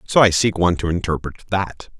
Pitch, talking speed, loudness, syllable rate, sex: 95 Hz, 210 wpm, -19 LUFS, 6.0 syllables/s, male